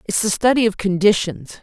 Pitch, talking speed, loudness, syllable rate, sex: 200 Hz, 185 wpm, -17 LUFS, 5.4 syllables/s, female